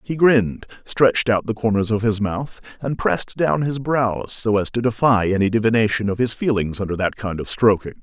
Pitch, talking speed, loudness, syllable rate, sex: 110 Hz, 210 wpm, -19 LUFS, 5.4 syllables/s, male